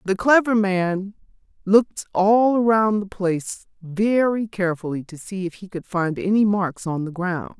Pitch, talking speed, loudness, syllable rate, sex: 195 Hz, 165 wpm, -21 LUFS, 4.5 syllables/s, female